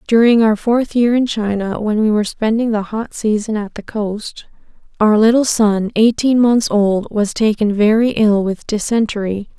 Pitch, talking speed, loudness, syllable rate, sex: 215 Hz, 175 wpm, -15 LUFS, 4.6 syllables/s, female